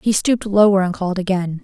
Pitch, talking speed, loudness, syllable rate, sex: 195 Hz, 220 wpm, -17 LUFS, 6.5 syllables/s, female